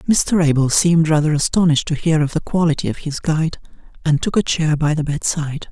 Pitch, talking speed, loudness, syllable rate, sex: 155 Hz, 210 wpm, -17 LUFS, 5.9 syllables/s, male